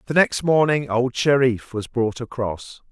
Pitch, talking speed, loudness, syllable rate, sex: 125 Hz, 165 wpm, -21 LUFS, 4.1 syllables/s, male